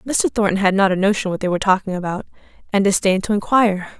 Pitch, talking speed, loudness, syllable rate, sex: 200 Hz, 225 wpm, -18 LUFS, 6.9 syllables/s, female